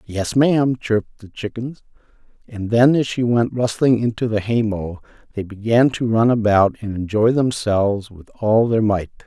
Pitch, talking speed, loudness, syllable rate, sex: 110 Hz, 175 wpm, -18 LUFS, 4.8 syllables/s, male